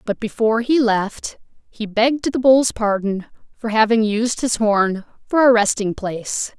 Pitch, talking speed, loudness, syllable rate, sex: 225 Hz, 165 wpm, -18 LUFS, 4.3 syllables/s, female